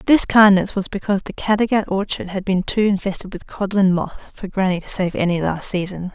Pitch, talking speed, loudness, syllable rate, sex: 195 Hz, 205 wpm, -19 LUFS, 5.6 syllables/s, female